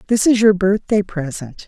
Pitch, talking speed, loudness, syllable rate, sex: 195 Hz, 180 wpm, -16 LUFS, 4.8 syllables/s, female